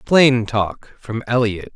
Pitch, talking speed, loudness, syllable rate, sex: 120 Hz, 135 wpm, -18 LUFS, 3.2 syllables/s, male